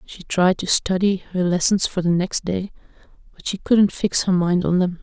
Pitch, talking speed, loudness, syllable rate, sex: 185 Hz, 215 wpm, -20 LUFS, 4.6 syllables/s, female